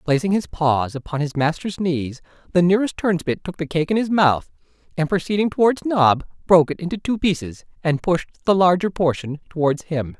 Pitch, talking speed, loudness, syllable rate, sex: 165 Hz, 190 wpm, -20 LUFS, 5.4 syllables/s, male